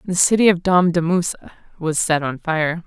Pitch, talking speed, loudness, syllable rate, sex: 170 Hz, 165 wpm, -18 LUFS, 5.2 syllables/s, female